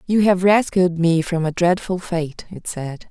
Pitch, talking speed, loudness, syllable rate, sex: 175 Hz, 195 wpm, -19 LUFS, 4.1 syllables/s, female